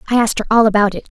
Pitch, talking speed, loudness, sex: 220 Hz, 315 wpm, -15 LUFS, female